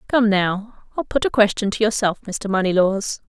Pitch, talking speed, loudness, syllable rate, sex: 210 Hz, 180 wpm, -20 LUFS, 5.0 syllables/s, female